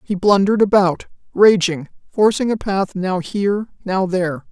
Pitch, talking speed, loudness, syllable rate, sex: 195 Hz, 145 wpm, -17 LUFS, 4.7 syllables/s, female